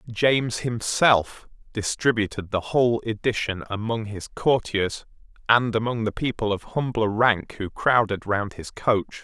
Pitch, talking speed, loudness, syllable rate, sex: 110 Hz, 135 wpm, -23 LUFS, 4.3 syllables/s, male